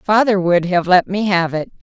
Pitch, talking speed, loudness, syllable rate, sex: 190 Hz, 220 wpm, -16 LUFS, 4.7 syllables/s, female